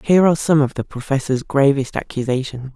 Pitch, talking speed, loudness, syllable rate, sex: 140 Hz, 175 wpm, -18 LUFS, 6.1 syllables/s, female